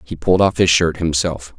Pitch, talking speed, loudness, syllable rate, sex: 80 Hz, 230 wpm, -16 LUFS, 5.4 syllables/s, male